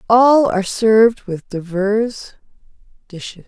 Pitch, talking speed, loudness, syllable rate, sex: 210 Hz, 105 wpm, -15 LUFS, 3.9 syllables/s, female